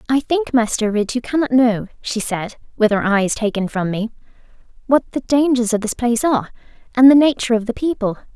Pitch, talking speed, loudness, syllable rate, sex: 235 Hz, 200 wpm, -17 LUFS, 5.7 syllables/s, female